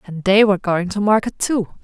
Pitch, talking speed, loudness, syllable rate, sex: 200 Hz, 230 wpm, -17 LUFS, 5.5 syllables/s, female